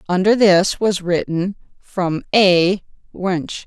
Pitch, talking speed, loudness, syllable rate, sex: 185 Hz, 115 wpm, -17 LUFS, 3.2 syllables/s, female